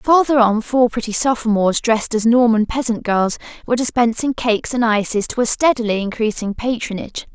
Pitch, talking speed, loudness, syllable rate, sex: 230 Hz, 165 wpm, -17 LUFS, 5.8 syllables/s, female